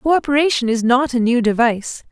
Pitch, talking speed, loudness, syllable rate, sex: 250 Hz, 170 wpm, -16 LUFS, 5.9 syllables/s, female